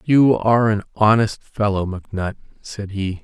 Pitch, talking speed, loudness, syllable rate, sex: 105 Hz, 150 wpm, -19 LUFS, 4.9 syllables/s, male